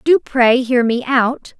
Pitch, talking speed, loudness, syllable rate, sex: 255 Hz, 190 wpm, -15 LUFS, 3.4 syllables/s, female